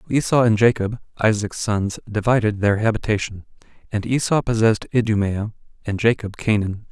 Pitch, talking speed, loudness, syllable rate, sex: 110 Hz, 140 wpm, -20 LUFS, 5.6 syllables/s, male